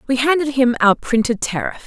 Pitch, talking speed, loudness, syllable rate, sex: 250 Hz, 195 wpm, -17 LUFS, 5.4 syllables/s, female